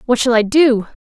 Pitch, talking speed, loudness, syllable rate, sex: 240 Hz, 230 wpm, -14 LUFS, 5.2 syllables/s, female